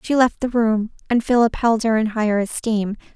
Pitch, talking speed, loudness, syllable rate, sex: 225 Hz, 210 wpm, -19 LUFS, 5.1 syllables/s, female